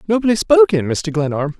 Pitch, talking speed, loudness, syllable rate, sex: 170 Hz, 150 wpm, -15 LUFS, 4.9 syllables/s, male